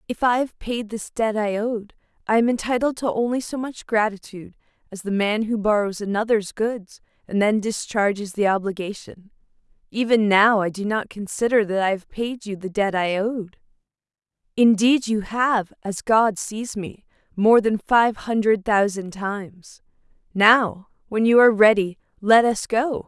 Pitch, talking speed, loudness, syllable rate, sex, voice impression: 215 Hz, 165 wpm, -21 LUFS, 4.5 syllables/s, female, feminine, slightly adult-like, clear, slightly intellectual, friendly, slightly kind